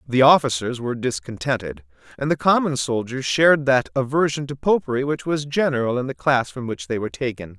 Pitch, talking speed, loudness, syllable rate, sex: 130 Hz, 190 wpm, -21 LUFS, 5.8 syllables/s, male